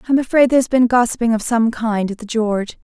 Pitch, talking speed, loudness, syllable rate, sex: 230 Hz, 270 wpm, -17 LUFS, 6.8 syllables/s, female